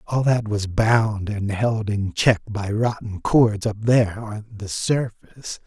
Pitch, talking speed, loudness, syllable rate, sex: 110 Hz, 170 wpm, -21 LUFS, 3.8 syllables/s, male